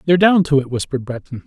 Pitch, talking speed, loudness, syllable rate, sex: 145 Hz, 245 wpm, -16 LUFS, 7.7 syllables/s, male